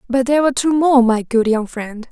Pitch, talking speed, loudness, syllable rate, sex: 250 Hz, 255 wpm, -15 LUFS, 5.7 syllables/s, female